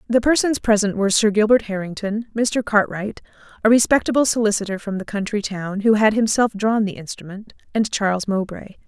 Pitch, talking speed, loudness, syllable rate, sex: 210 Hz, 170 wpm, -19 LUFS, 5.5 syllables/s, female